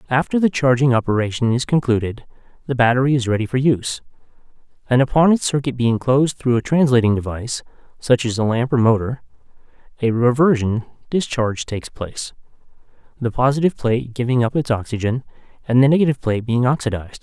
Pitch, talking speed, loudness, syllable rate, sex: 125 Hz, 160 wpm, -18 LUFS, 6.5 syllables/s, male